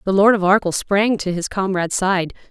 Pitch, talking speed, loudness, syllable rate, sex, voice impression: 190 Hz, 215 wpm, -18 LUFS, 5.3 syllables/s, female, very feminine, adult-like, slightly clear, intellectual, slightly strict